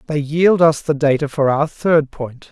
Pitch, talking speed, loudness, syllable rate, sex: 150 Hz, 215 wpm, -16 LUFS, 4.3 syllables/s, male